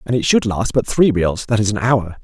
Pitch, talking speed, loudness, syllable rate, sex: 110 Hz, 295 wpm, -17 LUFS, 5.6 syllables/s, male